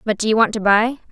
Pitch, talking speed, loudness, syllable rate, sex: 220 Hz, 325 wpm, -16 LUFS, 6.7 syllables/s, female